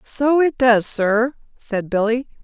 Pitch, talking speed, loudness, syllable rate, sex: 240 Hz, 150 wpm, -18 LUFS, 3.5 syllables/s, female